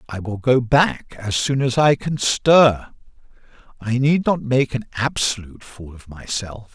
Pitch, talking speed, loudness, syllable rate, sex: 120 Hz, 170 wpm, -19 LUFS, 4.2 syllables/s, male